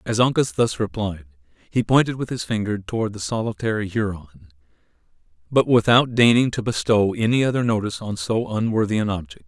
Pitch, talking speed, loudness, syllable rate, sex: 105 Hz, 165 wpm, -21 LUFS, 5.8 syllables/s, male